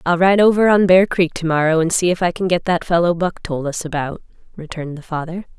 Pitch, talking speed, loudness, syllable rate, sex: 170 Hz, 245 wpm, -17 LUFS, 5.9 syllables/s, female